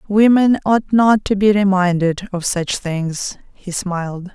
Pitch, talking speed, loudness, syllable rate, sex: 195 Hz, 150 wpm, -17 LUFS, 3.8 syllables/s, female